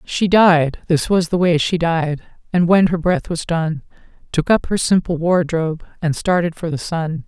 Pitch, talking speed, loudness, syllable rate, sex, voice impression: 170 Hz, 200 wpm, -17 LUFS, 4.6 syllables/s, female, very feminine, slightly young, very adult-like, thin, slightly relaxed, slightly weak, slightly dark, hard, clear, fluent, slightly cute, cool, very intellectual, refreshing, sincere, very calm, friendly, reassuring, unique, very elegant, slightly sweet, strict, sharp, slightly modest, light